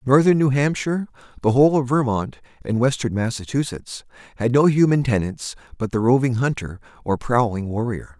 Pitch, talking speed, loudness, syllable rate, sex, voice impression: 125 Hz, 155 wpm, -20 LUFS, 5.4 syllables/s, male, masculine, adult-like, slightly bright, clear, fluent, slightly cool, sincere, calm, friendly, reassuring, kind, light